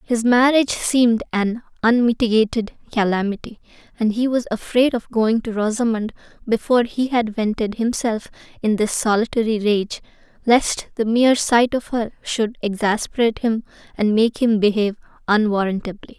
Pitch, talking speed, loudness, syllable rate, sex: 225 Hz, 135 wpm, -19 LUFS, 5.1 syllables/s, female